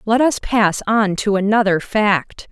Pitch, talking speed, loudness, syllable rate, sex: 210 Hz, 165 wpm, -17 LUFS, 3.9 syllables/s, female